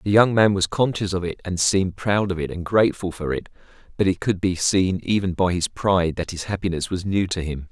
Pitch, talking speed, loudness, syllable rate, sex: 95 Hz, 250 wpm, -22 LUFS, 5.7 syllables/s, male